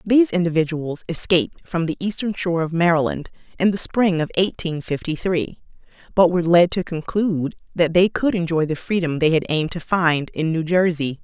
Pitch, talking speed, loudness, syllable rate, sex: 170 Hz, 185 wpm, -20 LUFS, 5.4 syllables/s, female